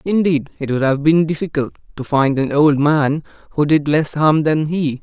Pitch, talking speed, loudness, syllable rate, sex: 150 Hz, 205 wpm, -16 LUFS, 4.7 syllables/s, male